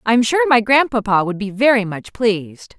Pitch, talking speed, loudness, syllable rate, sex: 225 Hz, 195 wpm, -16 LUFS, 5.0 syllables/s, female